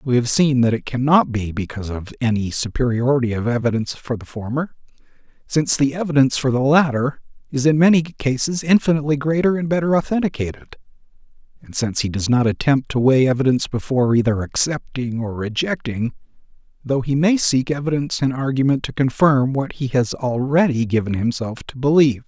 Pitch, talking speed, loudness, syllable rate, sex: 130 Hz, 165 wpm, -19 LUFS, 5.8 syllables/s, male